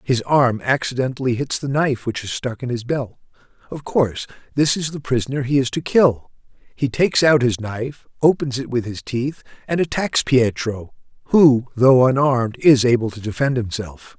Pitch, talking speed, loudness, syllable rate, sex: 130 Hz, 180 wpm, -19 LUFS, 5.0 syllables/s, male